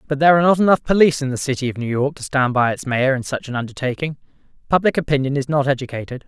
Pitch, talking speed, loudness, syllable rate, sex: 140 Hz, 250 wpm, -19 LUFS, 7.3 syllables/s, male